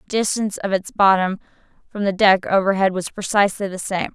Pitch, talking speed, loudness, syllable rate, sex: 195 Hz, 190 wpm, -19 LUFS, 6.0 syllables/s, female